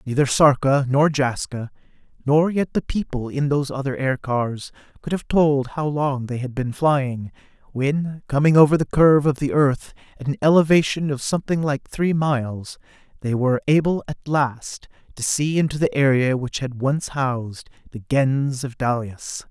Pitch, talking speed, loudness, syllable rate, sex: 140 Hz, 170 wpm, -21 LUFS, 4.7 syllables/s, male